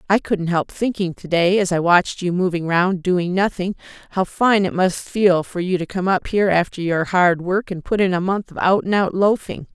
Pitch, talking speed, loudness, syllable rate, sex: 185 Hz, 240 wpm, -19 LUFS, 5.0 syllables/s, female